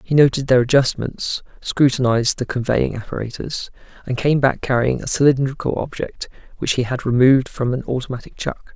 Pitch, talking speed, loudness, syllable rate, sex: 130 Hz, 160 wpm, -19 LUFS, 5.5 syllables/s, male